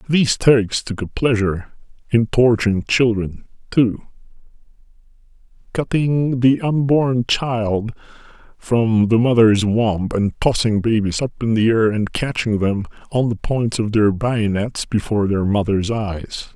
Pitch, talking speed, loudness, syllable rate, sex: 110 Hz, 135 wpm, -18 LUFS, 4.1 syllables/s, male